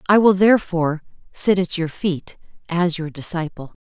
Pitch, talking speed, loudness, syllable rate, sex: 175 Hz, 155 wpm, -20 LUFS, 5.0 syllables/s, female